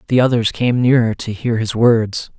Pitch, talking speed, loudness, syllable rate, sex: 115 Hz, 200 wpm, -16 LUFS, 4.7 syllables/s, male